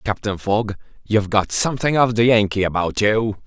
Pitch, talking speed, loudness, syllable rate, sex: 105 Hz, 175 wpm, -19 LUFS, 5.3 syllables/s, male